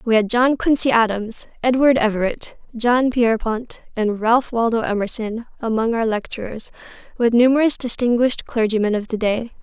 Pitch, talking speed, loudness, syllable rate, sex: 230 Hz, 145 wpm, -19 LUFS, 5.0 syllables/s, female